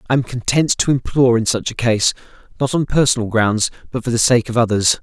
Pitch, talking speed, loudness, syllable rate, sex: 120 Hz, 225 wpm, -17 LUFS, 6.0 syllables/s, male